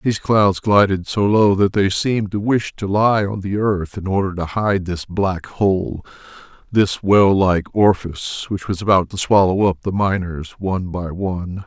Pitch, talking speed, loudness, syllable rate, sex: 95 Hz, 190 wpm, -18 LUFS, 4.5 syllables/s, male